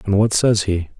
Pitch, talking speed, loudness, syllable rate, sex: 100 Hz, 240 wpm, -17 LUFS, 4.9 syllables/s, male